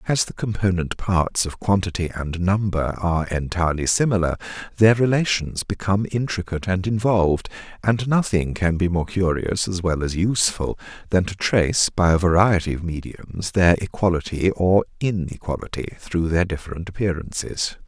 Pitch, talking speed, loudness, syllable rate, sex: 90 Hz, 145 wpm, -21 LUFS, 5.1 syllables/s, male